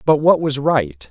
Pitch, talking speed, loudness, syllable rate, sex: 135 Hz, 220 wpm, -16 LUFS, 4.0 syllables/s, male